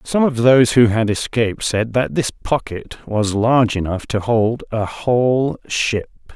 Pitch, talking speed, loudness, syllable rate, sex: 115 Hz, 170 wpm, -17 LUFS, 4.3 syllables/s, male